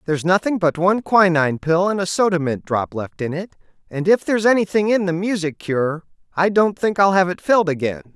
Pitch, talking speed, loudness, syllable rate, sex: 180 Hz, 220 wpm, -18 LUFS, 5.7 syllables/s, male